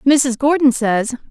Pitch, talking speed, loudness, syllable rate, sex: 255 Hz, 140 wpm, -15 LUFS, 3.6 syllables/s, female